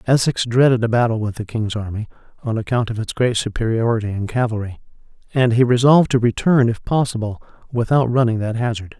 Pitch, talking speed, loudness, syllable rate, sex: 115 Hz, 180 wpm, -18 LUFS, 6.0 syllables/s, male